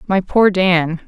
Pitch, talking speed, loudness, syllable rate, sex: 185 Hz, 170 wpm, -15 LUFS, 3.4 syllables/s, female